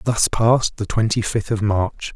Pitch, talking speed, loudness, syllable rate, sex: 110 Hz, 195 wpm, -19 LUFS, 4.4 syllables/s, male